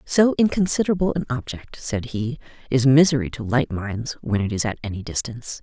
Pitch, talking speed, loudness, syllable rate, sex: 130 Hz, 180 wpm, -22 LUFS, 5.6 syllables/s, female